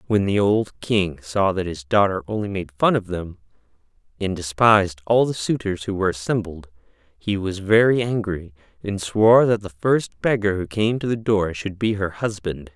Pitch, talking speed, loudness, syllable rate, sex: 100 Hz, 190 wpm, -21 LUFS, 4.8 syllables/s, male